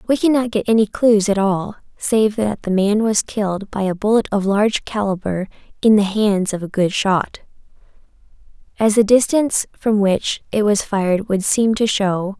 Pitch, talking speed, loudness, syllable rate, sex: 205 Hz, 185 wpm, -17 LUFS, 4.8 syllables/s, female